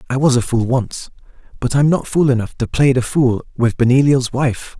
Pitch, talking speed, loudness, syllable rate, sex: 130 Hz, 215 wpm, -16 LUFS, 5.1 syllables/s, male